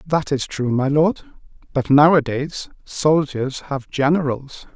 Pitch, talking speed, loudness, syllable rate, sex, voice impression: 140 Hz, 125 wpm, -19 LUFS, 3.8 syllables/s, male, masculine, slightly old, slightly thick, slightly intellectual, calm, friendly, slightly elegant